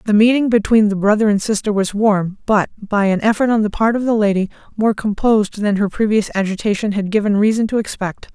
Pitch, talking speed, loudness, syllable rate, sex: 210 Hz, 215 wpm, -16 LUFS, 5.8 syllables/s, female